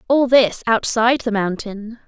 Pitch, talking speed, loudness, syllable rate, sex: 230 Hz, 145 wpm, -17 LUFS, 4.5 syllables/s, female